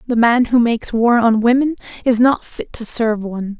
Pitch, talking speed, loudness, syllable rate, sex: 235 Hz, 215 wpm, -16 LUFS, 5.5 syllables/s, female